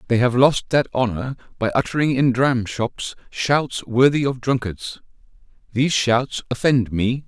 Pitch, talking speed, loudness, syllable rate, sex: 125 Hz, 140 wpm, -20 LUFS, 4.3 syllables/s, male